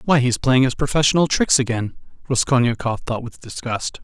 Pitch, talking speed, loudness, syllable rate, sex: 130 Hz, 165 wpm, -19 LUFS, 5.3 syllables/s, male